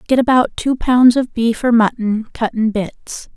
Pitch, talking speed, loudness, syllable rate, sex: 235 Hz, 195 wpm, -15 LUFS, 4.2 syllables/s, female